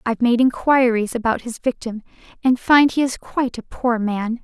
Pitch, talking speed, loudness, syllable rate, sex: 240 Hz, 190 wpm, -19 LUFS, 5.1 syllables/s, female